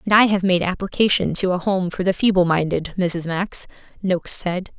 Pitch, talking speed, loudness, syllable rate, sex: 185 Hz, 200 wpm, -20 LUFS, 5.2 syllables/s, female